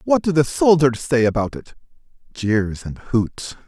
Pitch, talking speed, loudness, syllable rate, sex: 130 Hz, 165 wpm, -19 LUFS, 4.2 syllables/s, male